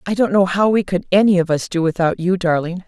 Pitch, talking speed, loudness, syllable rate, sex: 180 Hz, 270 wpm, -17 LUFS, 6.0 syllables/s, female